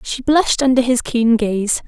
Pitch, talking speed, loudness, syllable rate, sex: 245 Hz, 190 wpm, -16 LUFS, 4.6 syllables/s, female